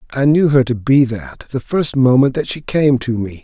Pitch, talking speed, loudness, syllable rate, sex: 130 Hz, 245 wpm, -15 LUFS, 4.9 syllables/s, male